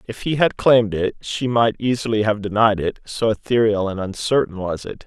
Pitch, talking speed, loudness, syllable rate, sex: 110 Hz, 200 wpm, -19 LUFS, 5.2 syllables/s, male